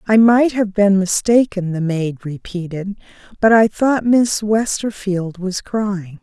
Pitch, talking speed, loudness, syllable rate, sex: 200 Hz, 135 wpm, -17 LUFS, 3.7 syllables/s, female